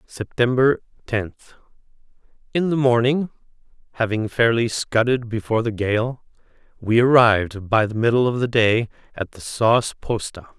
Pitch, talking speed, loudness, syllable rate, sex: 115 Hz, 125 wpm, -20 LUFS, 4.7 syllables/s, male